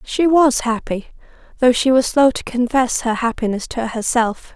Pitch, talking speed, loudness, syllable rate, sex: 245 Hz, 170 wpm, -17 LUFS, 4.6 syllables/s, female